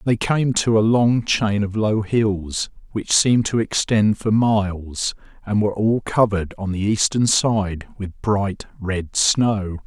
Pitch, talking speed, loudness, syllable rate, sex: 105 Hz, 165 wpm, -20 LUFS, 3.8 syllables/s, male